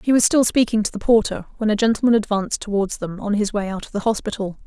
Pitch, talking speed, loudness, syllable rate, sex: 215 Hz, 255 wpm, -20 LUFS, 6.6 syllables/s, female